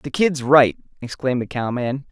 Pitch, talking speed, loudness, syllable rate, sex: 130 Hz, 170 wpm, -19 LUFS, 5.0 syllables/s, male